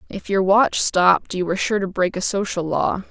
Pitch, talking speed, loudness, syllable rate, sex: 190 Hz, 230 wpm, -19 LUFS, 5.2 syllables/s, female